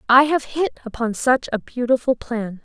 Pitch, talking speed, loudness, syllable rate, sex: 245 Hz, 180 wpm, -20 LUFS, 4.6 syllables/s, female